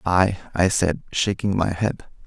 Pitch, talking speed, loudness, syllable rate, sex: 95 Hz, 160 wpm, -22 LUFS, 4.0 syllables/s, male